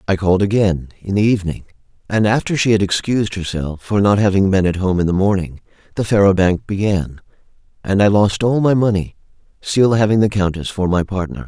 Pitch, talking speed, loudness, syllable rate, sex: 100 Hz, 200 wpm, -16 LUFS, 5.8 syllables/s, male